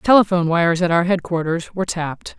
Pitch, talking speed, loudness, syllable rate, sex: 175 Hz, 175 wpm, -18 LUFS, 6.4 syllables/s, female